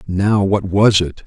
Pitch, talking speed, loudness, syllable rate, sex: 100 Hz, 190 wpm, -15 LUFS, 3.5 syllables/s, male